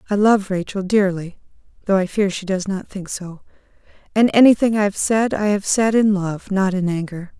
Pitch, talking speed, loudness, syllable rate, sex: 195 Hz, 205 wpm, -18 LUFS, 5.0 syllables/s, female